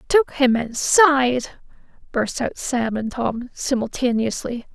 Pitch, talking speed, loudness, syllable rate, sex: 255 Hz, 115 wpm, -20 LUFS, 3.8 syllables/s, female